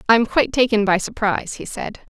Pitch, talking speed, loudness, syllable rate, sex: 220 Hz, 195 wpm, -19 LUFS, 5.8 syllables/s, female